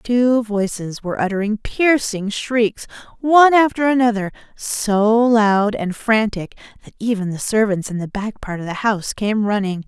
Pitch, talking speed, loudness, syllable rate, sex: 215 Hz, 160 wpm, -18 LUFS, 4.5 syllables/s, female